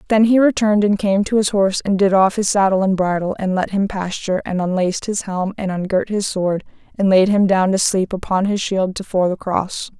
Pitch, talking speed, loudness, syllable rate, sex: 195 Hz, 240 wpm, -18 LUFS, 5.4 syllables/s, female